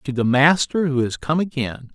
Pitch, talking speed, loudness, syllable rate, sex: 140 Hz, 215 wpm, -19 LUFS, 4.8 syllables/s, male